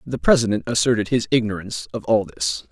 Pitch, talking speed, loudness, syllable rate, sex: 115 Hz, 175 wpm, -20 LUFS, 6.3 syllables/s, male